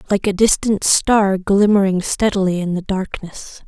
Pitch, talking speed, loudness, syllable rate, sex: 195 Hz, 145 wpm, -16 LUFS, 4.4 syllables/s, female